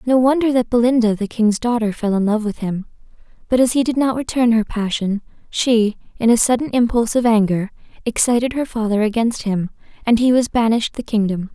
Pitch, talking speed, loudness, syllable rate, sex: 230 Hz, 200 wpm, -18 LUFS, 5.7 syllables/s, female